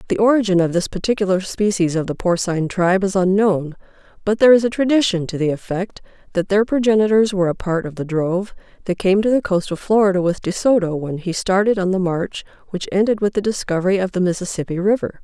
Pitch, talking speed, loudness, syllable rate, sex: 190 Hz, 215 wpm, -18 LUFS, 6.3 syllables/s, female